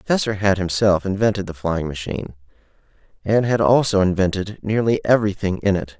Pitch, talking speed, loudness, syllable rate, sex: 100 Hz, 160 wpm, -19 LUFS, 6.0 syllables/s, male